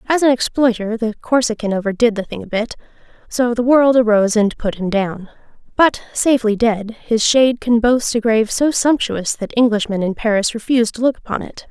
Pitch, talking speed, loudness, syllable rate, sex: 230 Hz, 190 wpm, -16 LUFS, 5.5 syllables/s, female